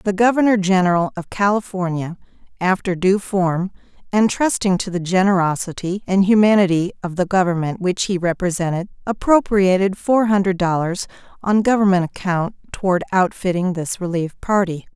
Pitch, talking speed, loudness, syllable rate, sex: 190 Hz, 130 wpm, -18 LUFS, 5.1 syllables/s, female